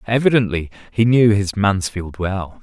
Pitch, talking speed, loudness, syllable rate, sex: 100 Hz, 135 wpm, -18 LUFS, 4.4 syllables/s, male